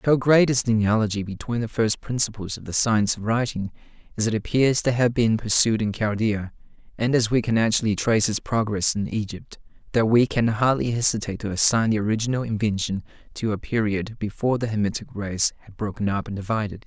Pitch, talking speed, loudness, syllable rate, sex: 110 Hz, 195 wpm, -23 LUFS, 5.9 syllables/s, male